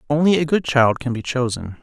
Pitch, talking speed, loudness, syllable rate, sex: 135 Hz, 230 wpm, -19 LUFS, 5.5 syllables/s, male